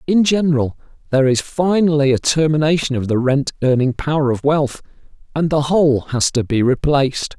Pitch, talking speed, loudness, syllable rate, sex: 145 Hz, 170 wpm, -17 LUFS, 5.5 syllables/s, male